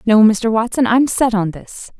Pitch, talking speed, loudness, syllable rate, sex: 225 Hz, 210 wpm, -15 LUFS, 4.4 syllables/s, female